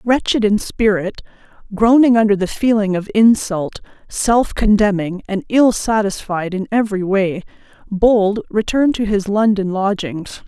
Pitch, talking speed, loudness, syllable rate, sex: 205 Hz, 130 wpm, -16 LUFS, 4.5 syllables/s, female